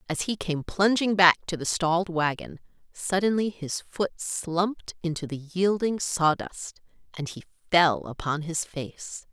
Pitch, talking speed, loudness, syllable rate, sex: 175 Hz, 150 wpm, -26 LUFS, 4.2 syllables/s, female